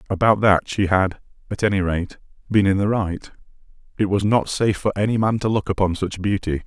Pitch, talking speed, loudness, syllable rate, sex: 100 Hz, 200 wpm, -20 LUFS, 5.6 syllables/s, male